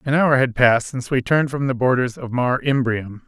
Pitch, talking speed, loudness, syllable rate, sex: 130 Hz, 240 wpm, -19 LUFS, 5.7 syllables/s, male